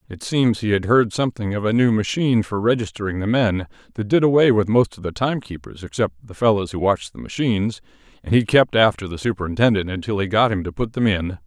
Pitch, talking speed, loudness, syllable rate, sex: 105 Hz, 225 wpm, -20 LUFS, 6.2 syllables/s, male